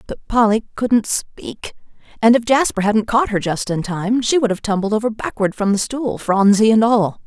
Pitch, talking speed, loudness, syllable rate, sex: 220 Hz, 205 wpm, -17 LUFS, 4.8 syllables/s, female